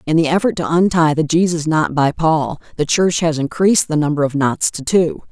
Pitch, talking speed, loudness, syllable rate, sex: 160 Hz, 225 wpm, -16 LUFS, 5.2 syllables/s, female